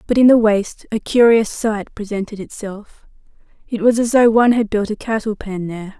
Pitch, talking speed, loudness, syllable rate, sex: 215 Hz, 200 wpm, -16 LUFS, 5.2 syllables/s, female